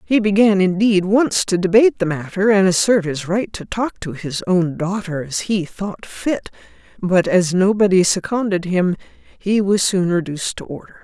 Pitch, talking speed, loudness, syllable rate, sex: 190 Hz, 180 wpm, -18 LUFS, 4.7 syllables/s, female